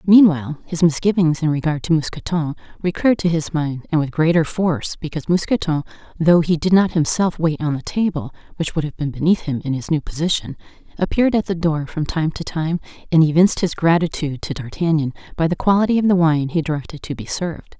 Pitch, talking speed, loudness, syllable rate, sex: 165 Hz, 205 wpm, -19 LUFS, 6.1 syllables/s, female